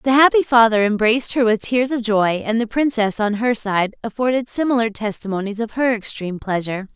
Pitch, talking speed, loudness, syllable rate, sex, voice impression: 225 Hz, 190 wpm, -18 LUFS, 5.6 syllables/s, female, slightly feminine, slightly adult-like, clear, refreshing, slightly unique, lively